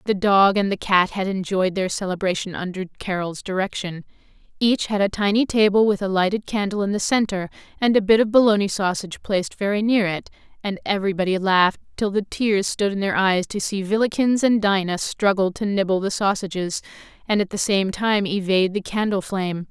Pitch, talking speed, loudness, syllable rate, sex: 195 Hz, 190 wpm, -21 LUFS, 5.6 syllables/s, female